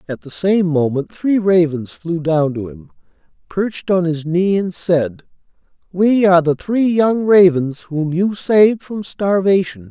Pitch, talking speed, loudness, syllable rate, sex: 175 Hz, 165 wpm, -16 LUFS, 4.2 syllables/s, male